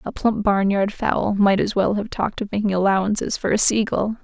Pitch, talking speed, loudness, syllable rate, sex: 205 Hz, 215 wpm, -20 LUFS, 5.4 syllables/s, female